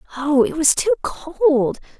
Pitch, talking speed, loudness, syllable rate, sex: 315 Hz, 150 wpm, -18 LUFS, 3.8 syllables/s, female